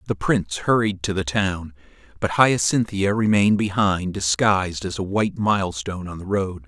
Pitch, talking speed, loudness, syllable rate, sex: 95 Hz, 160 wpm, -21 LUFS, 5.1 syllables/s, male